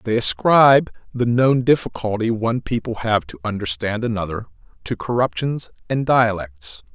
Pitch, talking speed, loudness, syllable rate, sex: 110 Hz, 130 wpm, -19 LUFS, 4.9 syllables/s, male